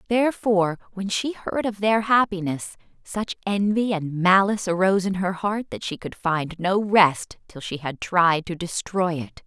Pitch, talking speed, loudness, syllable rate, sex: 190 Hz, 175 wpm, -23 LUFS, 4.6 syllables/s, female